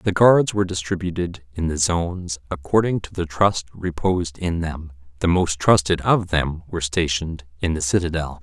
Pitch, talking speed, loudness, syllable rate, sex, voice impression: 85 Hz, 170 wpm, -21 LUFS, 5.1 syllables/s, male, masculine, adult-like, slightly thick, slightly fluent, slightly intellectual, slightly refreshing, slightly calm